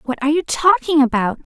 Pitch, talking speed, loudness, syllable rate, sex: 295 Hz, 200 wpm, -16 LUFS, 6.0 syllables/s, female